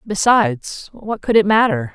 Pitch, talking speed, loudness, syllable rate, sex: 230 Hz, 155 wpm, -16 LUFS, 4.4 syllables/s, female